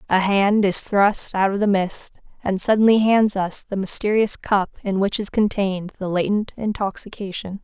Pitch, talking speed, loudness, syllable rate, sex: 200 Hz, 175 wpm, -20 LUFS, 4.8 syllables/s, female